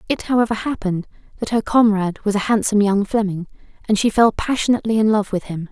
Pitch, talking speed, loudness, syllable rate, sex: 210 Hz, 200 wpm, -18 LUFS, 6.7 syllables/s, female